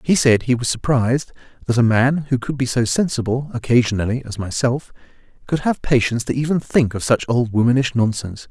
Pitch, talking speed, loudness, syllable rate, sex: 125 Hz, 190 wpm, -19 LUFS, 5.8 syllables/s, male